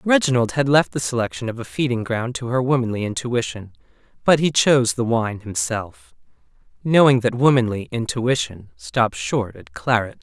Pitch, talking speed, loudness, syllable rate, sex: 120 Hz, 160 wpm, -20 LUFS, 5.0 syllables/s, male